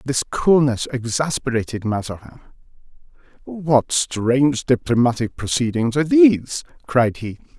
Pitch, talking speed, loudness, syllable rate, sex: 130 Hz, 95 wpm, -19 LUFS, 4.5 syllables/s, male